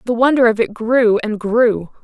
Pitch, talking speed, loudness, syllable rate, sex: 225 Hz, 175 wpm, -15 LUFS, 4.4 syllables/s, female